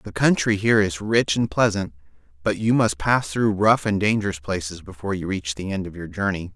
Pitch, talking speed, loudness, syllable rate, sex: 100 Hz, 220 wpm, -22 LUFS, 5.5 syllables/s, male